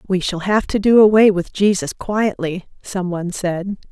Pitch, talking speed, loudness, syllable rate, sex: 190 Hz, 170 wpm, -17 LUFS, 4.6 syllables/s, female